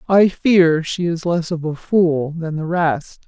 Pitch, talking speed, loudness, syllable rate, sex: 165 Hz, 200 wpm, -18 LUFS, 3.6 syllables/s, female